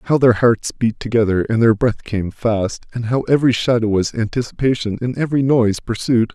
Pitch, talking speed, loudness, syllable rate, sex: 115 Hz, 190 wpm, -17 LUFS, 5.3 syllables/s, male